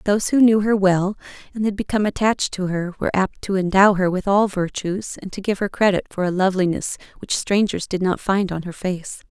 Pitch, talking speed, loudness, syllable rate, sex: 195 Hz, 225 wpm, -20 LUFS, 5.7 syllables/s, female